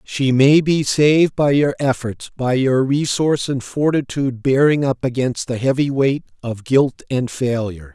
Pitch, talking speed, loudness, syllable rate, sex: 135 Hz, 165 wpm, -17 LUFS, 4.5 syllables/s, male